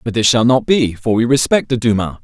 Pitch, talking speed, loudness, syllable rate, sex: 115 Hz, 270 wpm, -14 LUFS, 5.6 syllables/s, male